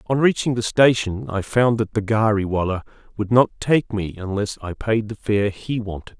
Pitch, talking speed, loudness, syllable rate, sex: 110 Hz, 205 wpm, -21 LUFS, 4.8 syllables/s, male